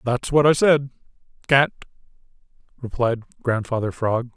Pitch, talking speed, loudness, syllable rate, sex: 125 Hz, 95 wpm, -20 LUFS, 4.3 syllables/s, male